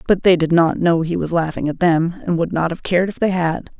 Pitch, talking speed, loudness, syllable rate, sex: 170 Hz, 285 wpm, -18 LUFS, 5.7 syllables/s, female